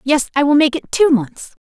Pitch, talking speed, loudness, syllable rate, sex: 280 Hz, 260 wpm, -15 LUFS, 5.4 syllables/s, female